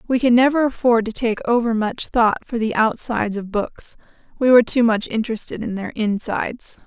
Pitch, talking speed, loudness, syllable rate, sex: 230 Hz, 185 wpm, -19 LUFS, 5.4 syllables/s, female